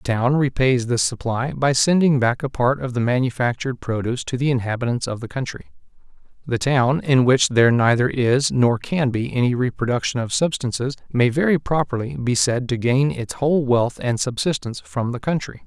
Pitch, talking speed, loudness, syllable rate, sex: 130 Hz, 190 wpm, -20 LUFS, 5.3 syllables/s, male